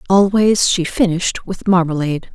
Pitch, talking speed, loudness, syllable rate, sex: 180 Hz, 130 wpm, -16 LUFS, 5.1 syllables/s, female